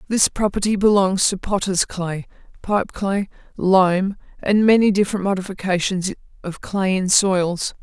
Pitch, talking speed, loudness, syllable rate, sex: 190 Hz, 130 wpm, -19 LUFS, 4.3 syllables/s, female